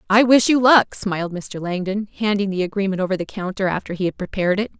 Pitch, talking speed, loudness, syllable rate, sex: 200 Hz, 225 wpm, -20 LUFS, 6.3 syllables/s, female